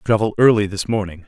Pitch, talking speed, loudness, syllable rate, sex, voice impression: 105 Hz, 190 wpm, -17 LUFS, 6.1 syllables/s, male, very masculine, adult-like, slightly thick, cool, intellectual, slightly sweet